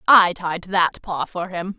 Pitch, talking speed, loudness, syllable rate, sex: 180 Hz, 200 wpm, -20 LUFS, 3.9 syllables/s, female